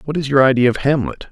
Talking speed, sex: 275 wpm, male